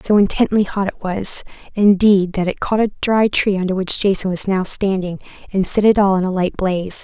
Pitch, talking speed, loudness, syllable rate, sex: 195 Hz, 220 wpm, -17 LUFS, 5.5 syllables/s, female